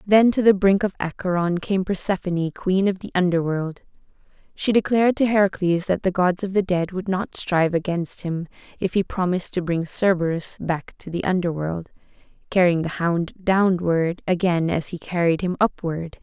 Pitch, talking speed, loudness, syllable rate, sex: 180 Hz, 175 wpm, -22 LUFS, 5.1 syllables/s, female